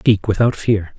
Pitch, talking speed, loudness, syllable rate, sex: 105 Hz, 185 wpm, -17 LUFS, 4.3 syllables/s, male